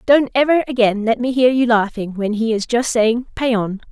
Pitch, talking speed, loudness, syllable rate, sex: 235 Hz, 215 wpm, -17 LUFS, 4.7 syllables/s, female